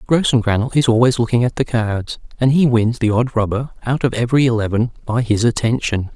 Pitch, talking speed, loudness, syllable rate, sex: 120 Hz, 195 wpm, -17 LUFS, 5.8 syllables/s, male